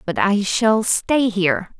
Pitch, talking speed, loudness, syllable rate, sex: 200 Hz, 165 wpm, -18 LUFS, 3.6 syllables/s, female